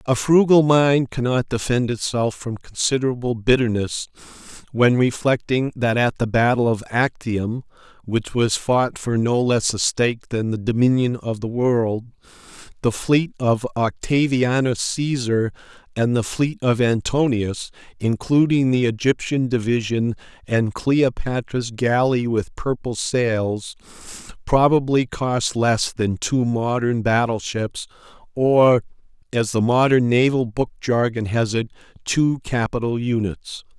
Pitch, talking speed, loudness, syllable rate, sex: 120 Hz, 125 wpm, -20 LUFS, 3.6 syllables/s, male